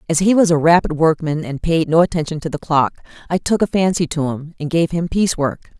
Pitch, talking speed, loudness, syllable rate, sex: 165 Hz, 250 wpm, -17 LUFS, 6.0 syllables/s, female